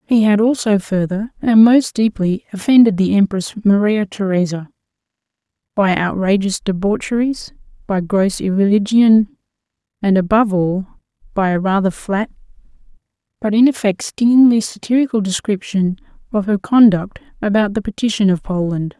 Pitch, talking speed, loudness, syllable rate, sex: 205 Hz, 125 wpm, -16 LUFS, 4.9 syllables/s, female